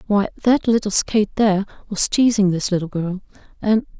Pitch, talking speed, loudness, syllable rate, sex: 200 Hz, 165 wpm, -19 LUFS, 5.5 syllables/s, female